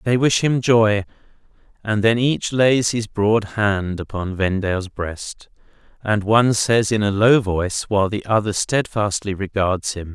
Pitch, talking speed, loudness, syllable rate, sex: 105 Hz, 160 wpm, -19 LUFS, 4.2 syllables/s, male